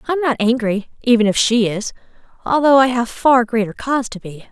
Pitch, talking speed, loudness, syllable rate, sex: 235 Hz, 215 wpm, -16 LUFS, 5.7 syllables/s, female